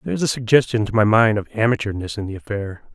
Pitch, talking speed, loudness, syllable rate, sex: 110 Hz, 245 wpm, -19 LUFS, 7.2 syllables/s, male